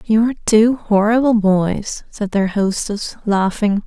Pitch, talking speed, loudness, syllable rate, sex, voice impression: 210 Hz, 125 wpm, -17 LUFS, 3.7 syllables/s, female, very feminine, slightly young, slightly adult-like, thin, slightly relaxed, slightly weak, slightly dark, very soft, muffled, slightly halting, slightly raspy, very cute, intellectual, slightly refreshing, very sincere, very calm, very friendly, very reassuring, unique, very elegant, very sweet, kind, very modest